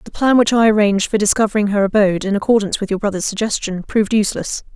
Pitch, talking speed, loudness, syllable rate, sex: 205 Hz, 215 wpm, -16 LUFS, 7.3 syllables/s, female